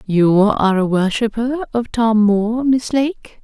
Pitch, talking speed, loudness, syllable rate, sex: 225 Hz, 155 wpm, -16 LUFS, 4.1 syllables/s, female